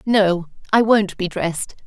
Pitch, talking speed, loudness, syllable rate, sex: 195 Hz, 160 wpm, -19 LUFS, 4.1 syllables/s, female